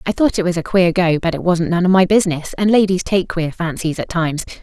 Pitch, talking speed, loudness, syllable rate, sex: 175 Hz, 275 wpm, -16 LUFS, 6.0 syllables/s, female